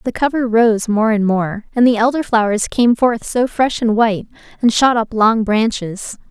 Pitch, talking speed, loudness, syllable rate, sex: 225 Hz, 200 wpm, -15 LUFS, 4.6 syllables/s, female